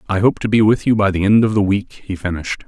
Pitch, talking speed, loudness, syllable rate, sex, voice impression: 100 Hz, 315 wpm, -16 LUFS, 6.5 syllables/s, male, very masculine, slightly old, very thick, tensed, slightly weak, slightly bright, slightly soft, slightly muffled, slightly halting, cool, very intellectual, slightly refreshing, very sincere, very calm, very mature, friendly, reassuring, very unique, slightly elegant, wild, slightly sweet, slightly lively, kind, slightly intense, modest